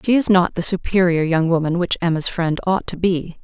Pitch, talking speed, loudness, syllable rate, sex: 175 Hz, 225 wpm, -18 LUFS, 5.3 syllables/s, female